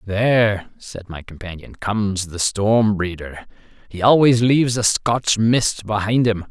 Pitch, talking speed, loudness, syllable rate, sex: 105 Hz, 150 wpm, -18 LUFS, 4.1 syllables/s, male